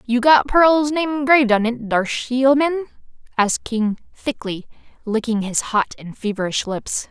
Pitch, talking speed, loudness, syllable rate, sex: 245 Hz, 160 wpm, -19 LUFS, 4.7 syllables/s, female